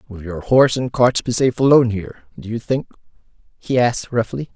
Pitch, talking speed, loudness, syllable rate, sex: 120 Hz, 195 wpm, -18 LUFS, 6.3 syllables/s, male